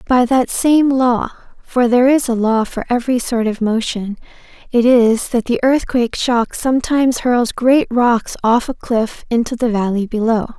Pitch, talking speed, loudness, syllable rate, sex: 240 Hz, 175 wpm, -15 LUFS, 3.4 syllables/s, female